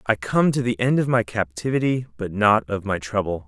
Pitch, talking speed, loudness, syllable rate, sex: 110 Hz, 225 wpm, -22 LUFS, 5.3 syllables/s, male